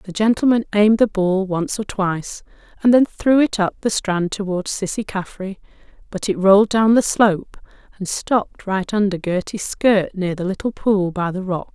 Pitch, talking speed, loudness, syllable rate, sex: 200 Hz, 190 wpm, -19 LUFS, 4.9 syllables/s, female